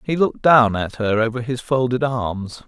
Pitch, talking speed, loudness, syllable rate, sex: 120 Hz, 200 wpm, -19 LUFS, 4.7 syllables/s, male